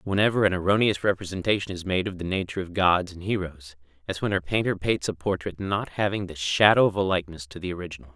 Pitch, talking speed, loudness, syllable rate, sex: 95 Hz, 215 wpm, -25 LUFS, 6.5 syllables/s, male